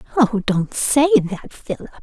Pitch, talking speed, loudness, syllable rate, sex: 225 Hz, 150 wpm, -18 LUFS, 4.5 syllables/s, female